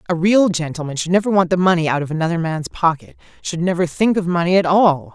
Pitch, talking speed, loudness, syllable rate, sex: 175 Hz, 220 wpm, -17 LUFS, 6.2 syllables/s, female